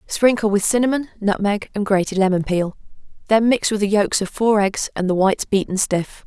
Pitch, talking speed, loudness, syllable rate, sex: 205 Hz, 200 wpm, -19 LUFS, 5.4 syllables/s, female